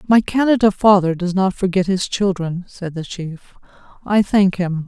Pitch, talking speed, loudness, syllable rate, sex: 190 Hz, 170 wpm, -17 LUFS, 4.7 syllables/s, female